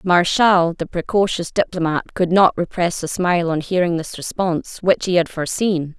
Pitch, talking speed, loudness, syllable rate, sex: 175 Hz, 170 wpm, -19 LUFS, 5.0 syllables/s, female